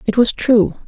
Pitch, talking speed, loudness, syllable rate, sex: 225 Hz, 205 wpm, -15 LUFS, 4.5 syllables/s, female